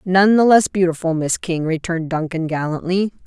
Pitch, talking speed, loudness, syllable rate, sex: 175 Hz, 165 wpm, -18 LUFS, 5.2 syllables/s, female